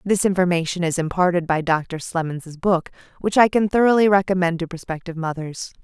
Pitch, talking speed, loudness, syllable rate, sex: 175 Hz, 165 wpm, -20 LUFS, 5.8 syllables/s, female